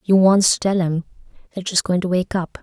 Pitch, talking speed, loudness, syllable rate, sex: 180 Hz, 250 wpm, -18 LUFS, 6.0 syllables/s, female